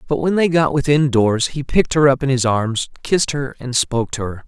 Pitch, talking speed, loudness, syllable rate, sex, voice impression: 135 Hz, 255 wpm, -17 LUFS, 5.6 syllables/s, male, masculine, adult-like, slightly powerful, slightly refreshing, sincere